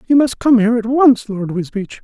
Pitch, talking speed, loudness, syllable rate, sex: 230 Hz, 235 wpm, -15 LUFS, 5.4 syllables/s, male